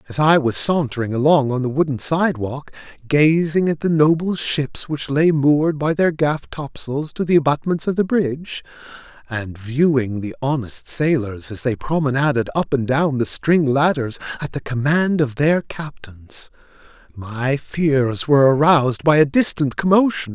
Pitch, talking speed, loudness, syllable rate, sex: 145 Hz, 160 wpm, -18 LUFS, 4.6 syllables/s, male